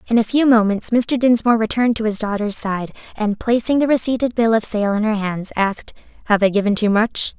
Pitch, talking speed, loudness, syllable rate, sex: 220 Hz, 220 wpm, -18 LUFS, 5.7 syllables/s, female